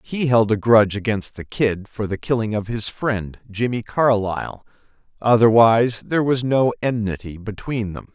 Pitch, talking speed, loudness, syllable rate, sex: 110 Hz, 160 wpm, -20 LUFS, 4.9 syllables/s, male